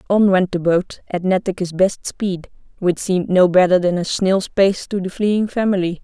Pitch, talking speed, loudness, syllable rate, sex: 185 Hz, 200 wpm, -18 LUFS, 4.8 syllables/s, female